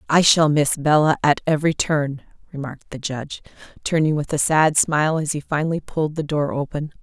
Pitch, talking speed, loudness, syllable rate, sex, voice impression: 150 Hz, 190 wpm, -20 LUFS, 5.8 syllables/s, female, gender-neutral, adult-like, relaxed, slightly weak, slightly soft, fluent, sincere, calm, slightly friendly, reassuring, elegant, kind